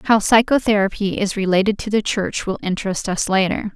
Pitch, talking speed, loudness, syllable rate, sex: 200 Hz, 175 wpm, -18 LUFS, 5.4 syllables/s, female